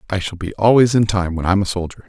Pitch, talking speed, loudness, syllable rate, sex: 100 Hz, 290 wpm, -17 LUFS, 6.4 syllables/s, male